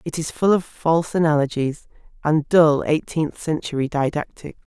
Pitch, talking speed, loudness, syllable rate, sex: 155 Hz, 140 wpm, -20 LUFS, 4.8 syllables/s, female